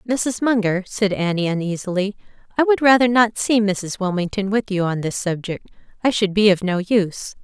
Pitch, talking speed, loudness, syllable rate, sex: 205 Hz, 185 wpm, -19 LUFS, 5.2 syllables/s, female